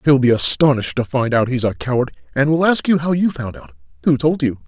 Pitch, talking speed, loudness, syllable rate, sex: 130 Hz, 255 wpm, -17 LUFS, 5.9 syllables/s, male